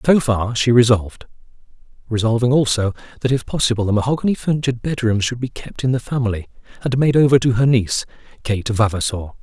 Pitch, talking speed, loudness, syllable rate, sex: 120 Hz, 165 wpm, -18 LUFS, 6.4 syllables/s, male